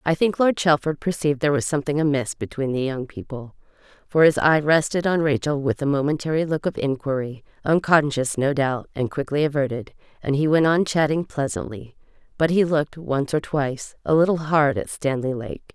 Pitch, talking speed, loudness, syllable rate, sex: 145 Hz, 185 wpm, -22 LUFS, 5.5 syllables/s, female